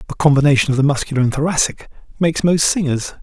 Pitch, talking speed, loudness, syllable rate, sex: 145 Hz, 185 wpm, -16 LUFS, 7.0 syllables/s, male